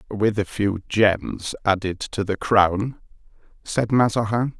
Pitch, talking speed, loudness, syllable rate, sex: 105 Hz, 130 wpm, -22 LUFS, 3.6 syllables/s, male